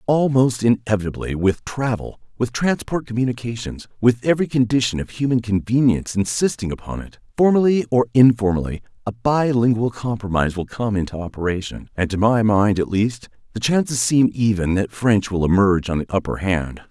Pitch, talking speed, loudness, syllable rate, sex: 110 Hz, 160 wpm, -19 LUFS, 5.5 syllables/s, male